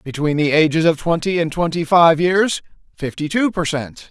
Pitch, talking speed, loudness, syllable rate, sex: 165 Hz, 190 wpm, -17 LUFS, 4.8 syllables/s, male